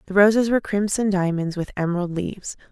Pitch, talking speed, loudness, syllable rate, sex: 195 Hz, 175 wpm, -21 LUFS, 6.3 syllables/s, female